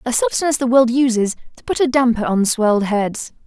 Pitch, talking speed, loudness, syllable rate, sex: 240 Hz, 210 wpm, -17 LUFS, 5.6 syllables/s, female